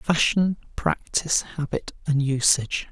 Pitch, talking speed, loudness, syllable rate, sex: 150 Hz, 105 wpm, -23 LUFS, 4.3 syllables/s, male